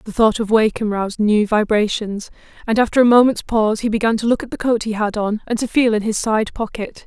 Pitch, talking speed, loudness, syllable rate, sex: 220 Hz, 245 wpm, -17 LUFS, 5.8 syllables/s, female